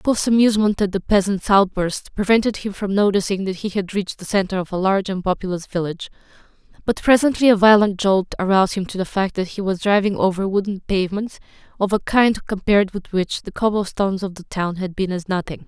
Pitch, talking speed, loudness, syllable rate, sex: 195 Hz, 205 wpm, -19 LUFS, 6.2 syllables/s, female